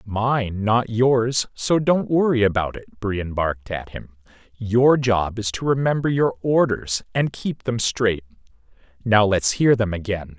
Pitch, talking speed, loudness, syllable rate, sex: 110 Hz, 155 wpm, -21 LUFS, 4.0 syllables/s, male